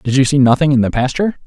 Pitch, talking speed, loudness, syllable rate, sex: 135 Hz, 285 wpm, -14 LUFS, 7.3 syllables/s, male